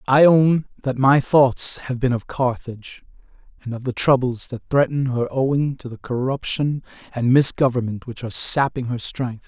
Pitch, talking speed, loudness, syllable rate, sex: 130 Hz, 170 wpm, -20 LUFS, 4.8 syllables/s, male